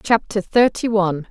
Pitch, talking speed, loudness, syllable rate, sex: 200 Hz, 140 wpm, -18 LUFS, 5.0 syllables/s, female